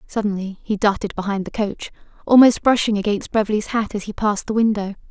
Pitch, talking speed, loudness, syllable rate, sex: 210 Hz, 190 wpm, -19 LUFS, 6.1 syllables/s, female